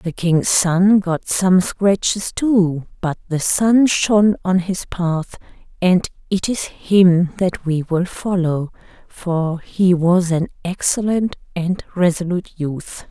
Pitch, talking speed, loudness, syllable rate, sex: 180 Hz, 135 wpm, -18 LUFS, 3.4 syllables/s, female